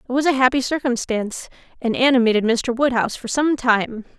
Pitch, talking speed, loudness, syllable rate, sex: 245 Hz, 170 wpm, -19 LUFS, 5.7 syllables/s, female